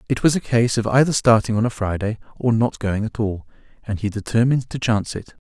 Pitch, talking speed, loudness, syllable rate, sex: 115 Hz, 230 wpm, -20 LUFS, 6.0 syllables/s, male